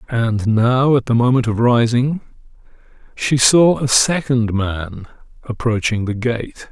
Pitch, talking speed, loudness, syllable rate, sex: 120 Hz, 135 wpm, -16 LUFS, 3.8 syllables/s, male